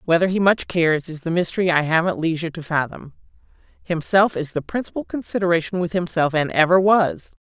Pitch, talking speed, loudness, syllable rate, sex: 170 Hz, 180 wpm, -20 LUFS, 5.9 syllables/s, female